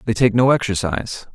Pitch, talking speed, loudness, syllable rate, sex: 110 Hz, 180 wpm, -18 LUFS, 5.9 syllables/s, male